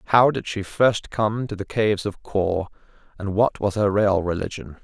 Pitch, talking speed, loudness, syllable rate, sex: 100 Hz, 200 wpm, -22 LUFS, 4.7 syllables/s, male